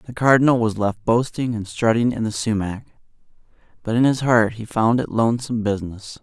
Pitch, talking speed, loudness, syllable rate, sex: 115 Hz, 185 wpm, -20 LUFS, 5.5 syllables/s, male